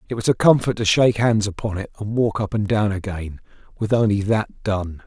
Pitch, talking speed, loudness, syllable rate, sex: 105 Hz, 225 wpm, -20 LUFS, 5.5 syllables/s, male